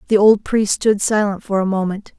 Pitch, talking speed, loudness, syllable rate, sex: 205 Hz, 220 wpm, -17 LUFS, 5.1 syllables/s, female